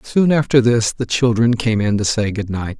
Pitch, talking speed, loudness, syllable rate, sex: 115 Hz, 235 wpm, -17 LUFS, 4.8 syllables/s, male